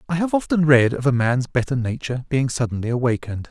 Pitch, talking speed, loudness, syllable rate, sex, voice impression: 130 Hz, 205 wpm, -20 LUFS, 6.4 syllables/s, male, masculine, adult-like, halting, intellectual, slightly refreshing, friendly, wild, kind, light